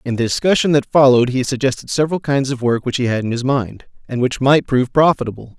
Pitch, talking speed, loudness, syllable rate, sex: 130 Hz, 235 wpm, -16 LUFS, 6.4 syllables/s, male